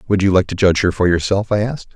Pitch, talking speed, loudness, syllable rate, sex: 95 Hz, 275 wpm, -16 LUFS, 6.9 syllables/s, male